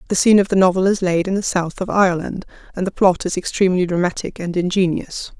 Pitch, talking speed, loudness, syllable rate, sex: 185 Hz, 225 wpm, -18 LUFS, 6.4 syllables/s, female